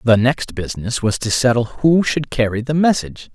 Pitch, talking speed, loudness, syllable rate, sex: 125 Hz, 195 wpm, -17 LUFS, 5.3 syllables/s, male